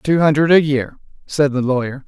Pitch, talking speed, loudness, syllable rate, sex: 145 Hz, 200 wpm, -16 LUFS, 5.2 syllables/s, male